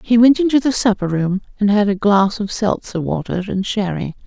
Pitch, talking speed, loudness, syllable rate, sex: 205 Hz, 210 wpm, -17 LUFS, 5.2 syllables/s, female